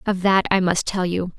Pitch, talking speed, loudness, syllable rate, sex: 185 Hz, 260 wpm, -20 LUFS, 5.0 syllables/s, female